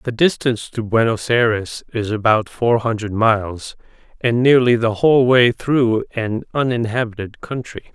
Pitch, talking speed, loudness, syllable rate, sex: 115 Hz, 145 wpm, -17 LUFS, 4.6 syllables/s, male